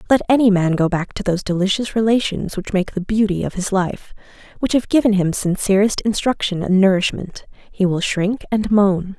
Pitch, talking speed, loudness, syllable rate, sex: 200 Hz, 190 wpm, -18 LUFS, 5.2 syllables/s, female